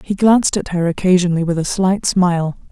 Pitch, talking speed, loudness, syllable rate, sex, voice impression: 180 Hz, 200 wpm, -16 LUFS, 5.9 syllables/s, female, very feminine, adult-like, slightly middle-aged, slightly thin, slightly relaxed, weak, dark, hard, muffled, very fluent, cute, slightly cool, very intellectual, sincere, calm, friendly, reassuring, very unique, elegant, slightly wild, sweet, kind, very modest